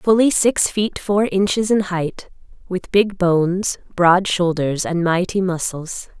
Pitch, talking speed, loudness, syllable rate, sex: 185 Hz, 145 wpm, -18 LUFS, 3.8 syllables/s, female